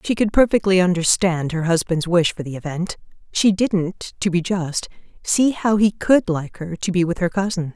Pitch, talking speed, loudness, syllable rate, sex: 185 Hz, 200 wpm, -19 LUFS, 4.8 syllables/s, female